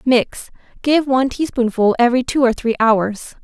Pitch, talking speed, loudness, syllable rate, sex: 245 Hz, 155 wpm, -16 LUFS, 4.9 syllables/s, female